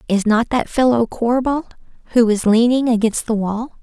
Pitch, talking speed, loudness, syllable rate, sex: 235 Hz, 175 wpm, -17 LUFS, 4.9 syllables/s, female